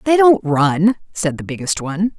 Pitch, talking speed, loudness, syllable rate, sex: 185 Hz, 190 wpm, -17 LUFS, 4.7 syllables/s, female